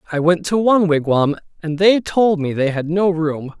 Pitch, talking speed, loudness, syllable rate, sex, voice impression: 170 Hz, 215 wpm, -17 LUFS, 4.9 syllables/s, male, very masculine, very adult-like, thick, very tensed, slightly powerful, bright, hard, clear, slightly halting, raspy, cool, slightly intellectual, very refreshing, very sincere, calm, mature, friendly, reassuring, unique, slightly elegant, wild, sweet, very lively, kind, slightly intense, slightly sharp